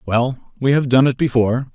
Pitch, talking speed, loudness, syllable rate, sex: 125 Hz, 205 wpm, -17 LUFS, 5.2 syllables/s, male